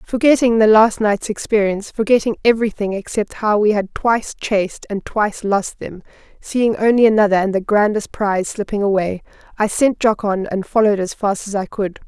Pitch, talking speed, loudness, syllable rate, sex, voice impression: 210 Hz, 185 wpm, -17 LUFS, 5.4 syllables/s, female, very feminine, slightly young, adult-like, very thin, slightly tensed, slightly weak, slightly bright, soft, clear, fluent, cute, very intellectual, refreshing, very sincere, calm, friendly, reassuring, unique, elegant, slightly wild, sweet, slightly lively, kind, slightly intense, slightly sharp